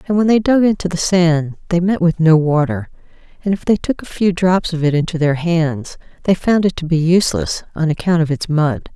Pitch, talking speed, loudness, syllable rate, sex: 170 Hz, 235 wpm, -16 LUFS, 5.3 syllables/s, female